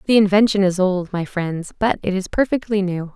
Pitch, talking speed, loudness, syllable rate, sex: 195 Hz, 210 wpm, -19 LUFS, 5.3 syllables/s, female